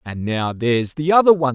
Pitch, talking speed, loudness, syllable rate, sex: 140 Hz, 235 wpm, -18 LUFS, 6.0 syllables/s, male